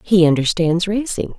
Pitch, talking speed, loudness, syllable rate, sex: 180 Hz, 130 wpm, -17 LUFS, 4.7 syllables/s, female